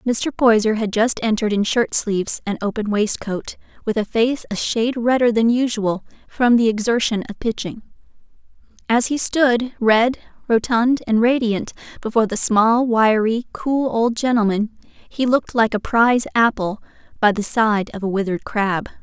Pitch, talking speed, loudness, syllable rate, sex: 225 Hz, 160 wpm, -19 LUFS, 4.8 syllables/s, female